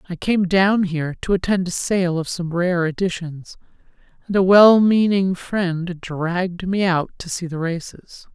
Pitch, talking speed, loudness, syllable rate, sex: 180 Hz, 175 wpm, -19 LUFS, 4.3 syllables/s, female